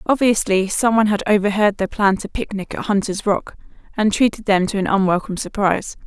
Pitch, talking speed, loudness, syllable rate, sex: 205 Hz, 190 wpm, -18 LUFS, 5.9 syllables/s, female